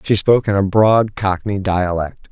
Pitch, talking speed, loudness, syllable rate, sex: 100 Hz, 180 wpm, -16 LUFS, 4.6 syllables/s, male